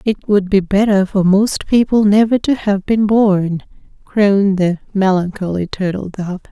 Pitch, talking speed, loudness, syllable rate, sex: 200 Hz, 155 wpm, -15 LUFS, 4.3 syllables/s, female